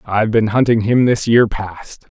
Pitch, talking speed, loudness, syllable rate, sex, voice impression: 110 Hz, 190 wpm, -14 LUFS, 4.5 syllables/s, male, very masculine, very adult-like, middle-aged, very thick, tensed, powerful, bright, slightly soft, clear, very fluent, very cool, very intellectual, slightly refreshing, sincere, very calm, very mature, very friendly, very reassuring, unique, slightly elegant, very wild, lively, kind